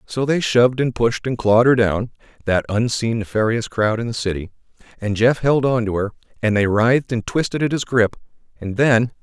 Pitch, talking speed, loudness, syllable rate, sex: 115 Hz, 195 wpm, -19 LUFS, 5.4 syllables/s, male